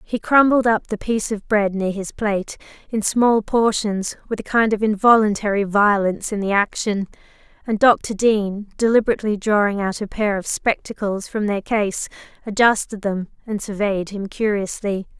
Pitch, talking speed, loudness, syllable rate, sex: 210 Hz, 160 wpm, -20 LUFS, 4.9 syllables/s, female